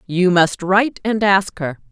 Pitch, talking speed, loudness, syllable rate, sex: 190 Hz, 190 wpm, -16 LUFS, 4.2 syllables/s, female